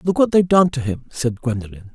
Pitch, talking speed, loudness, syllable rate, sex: 140 Hz, 245 wpm, -19 LUFS, 6.0 syllables/s, male